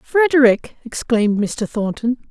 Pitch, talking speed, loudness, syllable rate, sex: 245 Hz, 105 wpm, -17 LUFS, 4.4 syllables/s, female